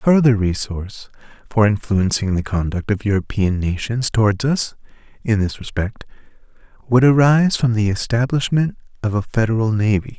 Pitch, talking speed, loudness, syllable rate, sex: 110 Hz, 140 wpm, -18 LUFS, 5.2 syllables/s, male